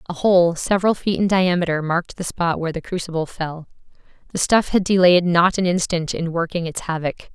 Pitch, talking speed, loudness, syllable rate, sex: 175 Hz, 195 wpm, -19 LUFS, 5.7 syllables/s, female